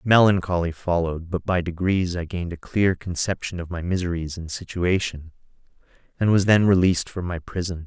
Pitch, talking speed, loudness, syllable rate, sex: 90 Hz, 170 wpm, -23 LUFS, 5.5 syllables/s, male